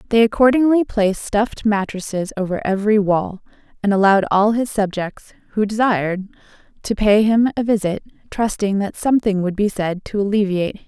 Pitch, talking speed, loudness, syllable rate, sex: 205 Hz, 165 wpm, -18 LUFS, 5.7 syllables/s, female